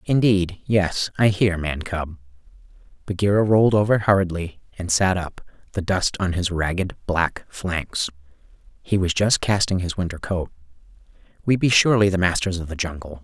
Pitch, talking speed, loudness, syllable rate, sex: 90 Hz, 160 wpm, -21 LUFS, 4.4 syllables/s, male